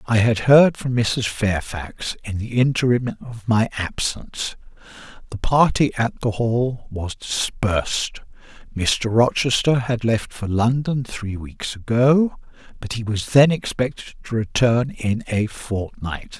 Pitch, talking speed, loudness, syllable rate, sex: 115 Hz, 140 wpm, -21 LUFS, 3.8 syllables/s, male